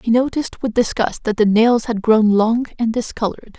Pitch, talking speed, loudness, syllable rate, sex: 230 Hz, 200 wpm, -17 LUFS, 5.3 syllables/s, female